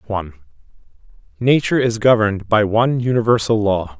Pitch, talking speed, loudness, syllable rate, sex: 110 Hz, 120 wpm, -17 LUFS, 6.1 syllables/s, male